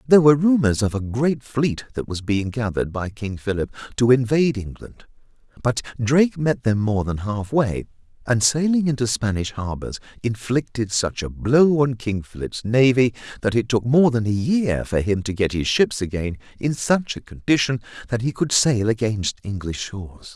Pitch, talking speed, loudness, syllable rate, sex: 115 Hz, 185 wpm, -21 LUFS, 4.9 syllables/s, male